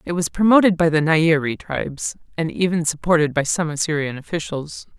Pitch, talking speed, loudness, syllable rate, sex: 160 Hz, 170 wpm, -19 LUFS, 5.4 syllables/s, female